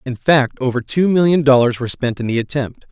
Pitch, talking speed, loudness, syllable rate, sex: 130 Hz, 225 wpm, -16 LUFS, 5.8 syllables/s, male